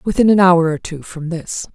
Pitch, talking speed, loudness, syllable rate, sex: 175 Hz, 240 wpm, -15 LUFS, 4.9 syllables/s, female